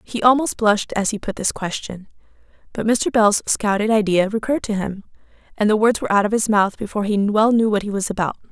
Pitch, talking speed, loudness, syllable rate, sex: 210 Hz, 225 wpm, -19 LUFS, 6.1 syllables/s, female